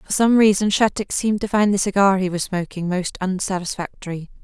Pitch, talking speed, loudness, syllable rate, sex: 195 Hz, 190 wpm, -20 LUFS, 5.8 syllables/s, female